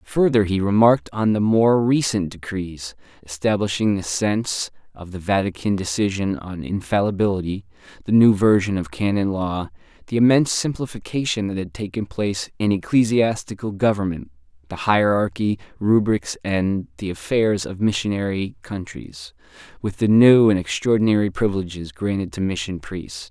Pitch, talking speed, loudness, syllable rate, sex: 100 Hz, 135 wpm, -21 LUFS, 5.0 syllables/s, male